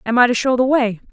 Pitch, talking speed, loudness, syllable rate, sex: 240 Hz, 320 wpm, -16 LUFS, 6.4 syllables/s, female